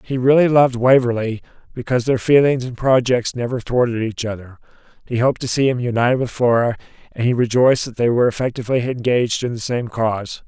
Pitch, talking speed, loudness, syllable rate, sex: 120 Hz, 190 wpm, -18 LUFS, 6.2 syllables/s, male